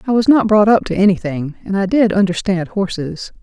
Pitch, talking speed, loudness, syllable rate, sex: 195 Hz, 210 wpm, -15 LUFS, 5.4 syllables/s, female